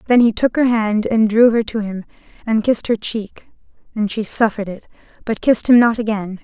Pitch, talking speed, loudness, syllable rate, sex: 220 Hz, 215 wpm, -17 LUFS, 5.5 syllables/s, female